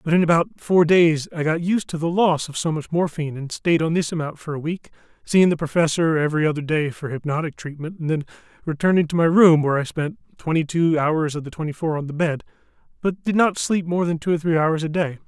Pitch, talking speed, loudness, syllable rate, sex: 160 Hz, 245 wpm, -21 LUFS, 5.9 syllables/s, male